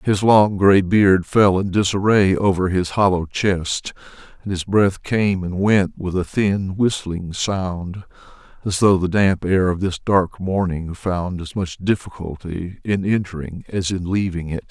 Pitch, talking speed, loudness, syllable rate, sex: 95 Hz, 165 wpm, -19 LUFS, 4.0 syllables/s, male